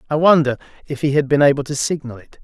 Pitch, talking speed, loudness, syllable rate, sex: 140 Hz, 245 wpm, -17 LUFS, 7.3 syllables/s, male